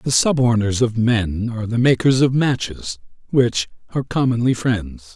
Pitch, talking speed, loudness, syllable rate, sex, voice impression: 115 Hz, 150 wpm, -18 LUFS, 4.6 syllables/s, male, masculine, very adult-like, slightly thick, cool, slightly intellectual, slightly calm